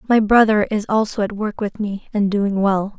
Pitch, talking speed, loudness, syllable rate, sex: 205 Hz, 220 wpm, -18 LUFS, 4.7 syllables/s, female